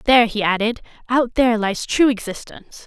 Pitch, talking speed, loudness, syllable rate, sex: 230 Hz, 165 wpm, -18 LUFS, 5.7 syllables/s, female